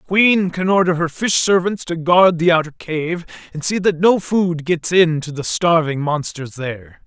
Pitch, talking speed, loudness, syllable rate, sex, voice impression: 170 Hz, 205 wpm, -17 LUFS, 4.6 syllables/s, male, very masculine, middle-aged, thick, tensed, slightly powerful, bright, slightly soft, clear, fluent, slightly raspy, cool, intellectual, very refreshing, sincere, slightly calm, mature, very friendly, very reassuring, unique, slightly elegant, wild, slightly sweet, very lively, kind, intense